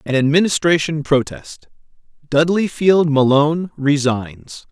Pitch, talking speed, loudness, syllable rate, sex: 150 Hz, 90 wpm, -16 LUFS, 4.1 syllables/s, male